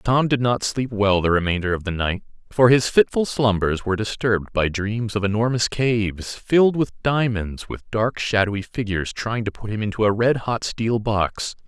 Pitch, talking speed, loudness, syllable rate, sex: 110 Hz, 195 wpm, -21 LUFS, 4.9 syllables/s, male